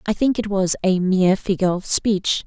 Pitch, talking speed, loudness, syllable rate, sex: 195 Hz, 220 wpm, -19 LUFS, 5.2 syllables/s, female